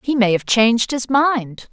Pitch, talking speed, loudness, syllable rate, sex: 240 Hz, 210 wpm, -17 LUFS, 4.4 syllables/s, female